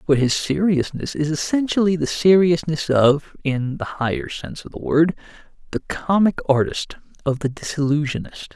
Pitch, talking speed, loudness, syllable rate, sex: 160 Hz, 145 wpm, -20 LUFS, 4.1 syllables/s, male